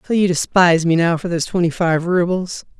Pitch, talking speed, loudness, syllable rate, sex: 175 Hz, 215 wpm, -17 LUFS, 6.0 syllables/s, male